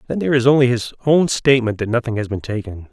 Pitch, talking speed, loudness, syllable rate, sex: 120 Hz, 245 wpm, -17 LUFS, 6.9 syllables/s, male